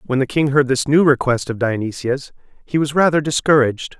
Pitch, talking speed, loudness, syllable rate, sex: 135 Hz, 195 wpm, -17 LUFS, 5.6 syllables/s, male